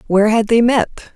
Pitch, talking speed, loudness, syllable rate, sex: 220 Hz, 210 wpm, -14 LUFS, 6.4 syllables/s, female